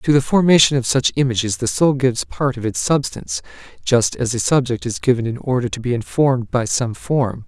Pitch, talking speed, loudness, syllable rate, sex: 125 Hz, 215 wpm, -18 LUFS, 5.6 syllables/s, male